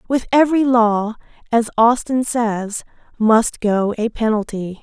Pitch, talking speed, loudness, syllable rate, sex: 225 Hz, 125 wpm, -17 LUFS, 3.9 syllables/s, female